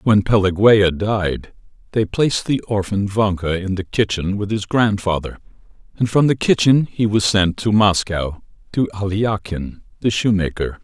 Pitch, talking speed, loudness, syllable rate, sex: 100 Hz, 150 wpm, -18 LUFS, 4.5 syllables/s, male